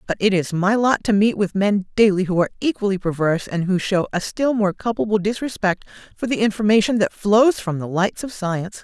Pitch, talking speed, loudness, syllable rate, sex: 200 Hz, 215 wpm, -20 LUFS, 5.7 syllables/s, female